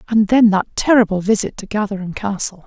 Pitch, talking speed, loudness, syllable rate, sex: 205 Hz, 180 wpm, -17 LUFS, 5.8 syllables/s, female